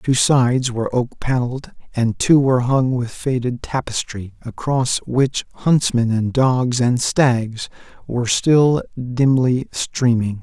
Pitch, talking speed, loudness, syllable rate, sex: 125 Hz, 130 wpm, -18 LUFS, 3.9 syllables/s, male